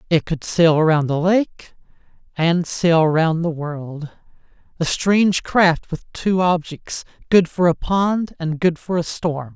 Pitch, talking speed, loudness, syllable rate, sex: 170 Hz, 155 wpm, -19 LUFS, 3.6 syllables/s, male